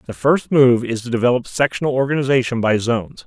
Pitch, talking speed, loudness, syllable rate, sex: 125 Hz, 185 wpm, -17 LUFS, 6.1 syllables/s, male